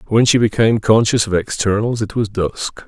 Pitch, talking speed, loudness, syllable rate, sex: 110 Hz, 190 wpm, -16 LUFS, 5.3 syllables/s, male